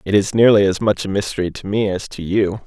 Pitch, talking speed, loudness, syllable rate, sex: 100 Hz, 270 wpm, -18 LUFS, 5.9 syllables/s, male